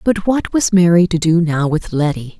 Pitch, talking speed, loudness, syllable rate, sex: 175 Hz, 225 wpm, -15 LUFS, 4.8 syllables/s, female